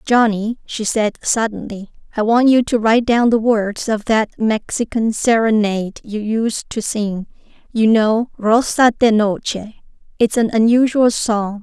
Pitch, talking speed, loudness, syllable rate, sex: 220 Hz, 150 wpm, -16 LUFS, 4.2 syllables/s, female